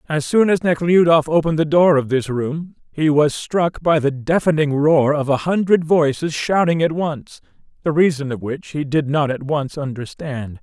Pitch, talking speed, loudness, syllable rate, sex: 150 Hz, 190 wpm, -18 LUFS, 4.7 syllables/s, male